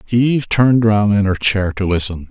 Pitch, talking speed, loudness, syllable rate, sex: 105 Hz, 210 wpm, -15 LUFS, 5.3 syllables/s, male